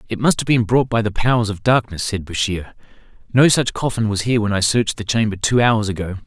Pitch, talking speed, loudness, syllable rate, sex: 110 Hz, 240 wpm, -18 LUFS, 6.0 syllables/s, male